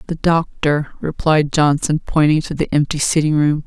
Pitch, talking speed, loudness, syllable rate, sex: 155 Hz, 165 wpm, -17 LUFS, 4.8 syllables/s, female